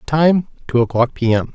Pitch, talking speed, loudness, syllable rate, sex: 135 Hz, 155 wpm, -17 LUFS, 4.8 syllables/s, male